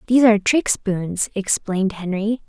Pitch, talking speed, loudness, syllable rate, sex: 205 Hz, 145 wpm, -19 LUFS, 5.0 syllables/s, female